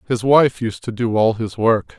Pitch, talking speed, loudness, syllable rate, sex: 115 Hz, 240 wpm, -17 LUFS, 4.3 syllables/s, male